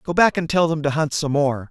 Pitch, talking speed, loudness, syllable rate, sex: 150 Hz, 315 wpm, -20 LUFS, 5.6 syllables/s, male